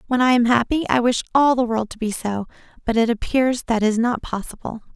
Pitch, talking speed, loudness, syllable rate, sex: 235 Hz, 230 wpm, -20 LUFS, 5.6 syllables/s, female